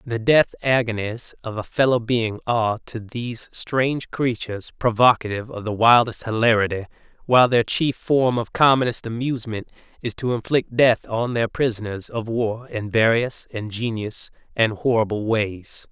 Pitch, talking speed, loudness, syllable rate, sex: 115 Hz, 145 wpm, -21 LUFS, 4.8 syllables/s, male